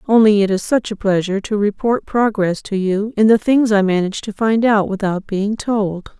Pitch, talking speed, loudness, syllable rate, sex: 205 Hz, 215 wpm, -17 LUFS, 5.0 syllables/s, female